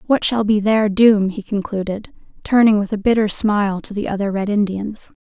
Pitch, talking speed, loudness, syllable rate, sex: 205 Hz, 195 wpm, -17 LUFS, 5.1 syllables/s, female